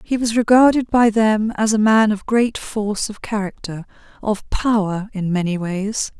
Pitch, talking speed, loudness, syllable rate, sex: 210 Hz, 175 wpm, -18 LUFS, 4.4 syllables/s, female